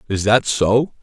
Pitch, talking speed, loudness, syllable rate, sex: 110 Hz, 175 wpm, -17 LUFS, 3.8 syllables/s, male